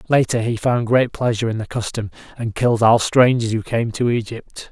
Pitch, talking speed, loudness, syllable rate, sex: 115 Hz, 205 wpm, -18 LUFS, 5.4 syllables/s, male